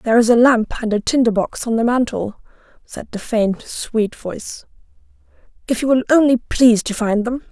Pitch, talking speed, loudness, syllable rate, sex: 230 Hz, 190 wpm, -17 LUFS, 5.1 syllables/s, female